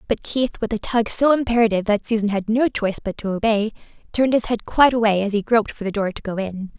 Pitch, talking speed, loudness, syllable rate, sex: 220 Hz, 255 wpm, -20 LUFS, 6.5 syllables/s, female